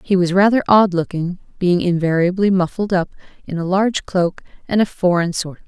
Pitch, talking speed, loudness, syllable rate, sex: 185 Hz, 200 wpm, -17 LUFS, 5.7 syllables/s, female